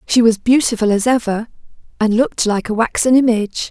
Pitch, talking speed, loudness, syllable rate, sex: 230 Hz, 180 wpm, -15 LUFS, 5.9 syllables/s, female